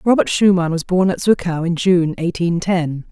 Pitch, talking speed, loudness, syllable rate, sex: 175 Hz, 190 wpm, -17 LUFS, 4.7 syllables/s, female